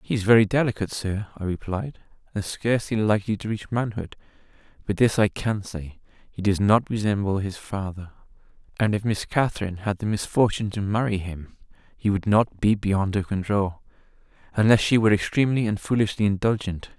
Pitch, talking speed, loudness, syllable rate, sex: 105 Hz, 165 wpm, -24 LUFS, 5.6 syllables/s, male